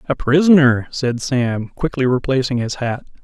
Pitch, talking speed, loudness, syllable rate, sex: 130 Hz, 150 wpm, -17 LUFS, 4.6 syllables/s, male